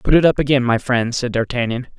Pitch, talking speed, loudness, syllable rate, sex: 125 Hz, 240 wpm, -18 LUFS, 6.0 syllables/s, male